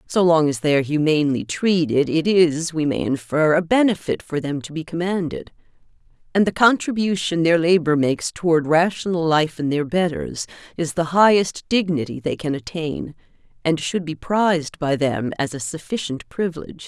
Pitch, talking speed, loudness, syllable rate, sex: 160 Hz, 170 wpm, -20 LUFS, 5.1 syllables/s, female